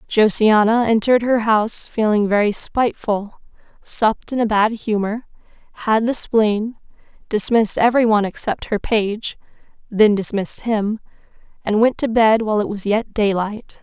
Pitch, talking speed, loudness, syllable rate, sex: 215 Hz, 145 wpm, -18 LUFS, 4.9 syllables/s, female